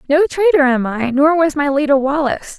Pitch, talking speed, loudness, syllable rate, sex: 290 Hz, 210 wpm, -15 LUFS, 5.4 syllables/s, female